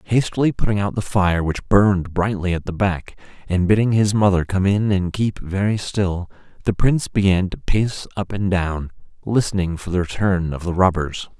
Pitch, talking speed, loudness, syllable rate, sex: 95 Hz, 190 wpm, -20 LUFS, 4.9 syllables/s, male